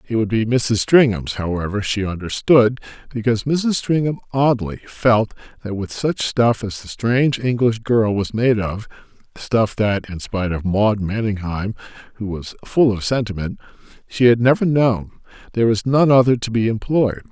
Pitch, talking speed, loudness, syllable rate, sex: 115 Hz, 165 wpm, -18 LUFS, 4.3 syllables/s, male